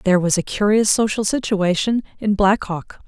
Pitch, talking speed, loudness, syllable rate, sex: 205 Hz, 175 wpm, -19 LUFS, 5.0 syllables/s, female